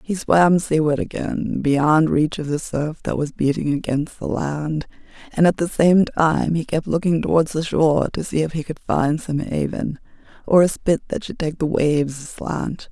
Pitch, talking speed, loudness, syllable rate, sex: 160 Hz, 200 wpm, -20 LUFS, 4.5 syllables/s, female